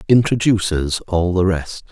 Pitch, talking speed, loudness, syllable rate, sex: 95 Hz, 125 wpm, -18 LUFS, 4.3 syllables/s, male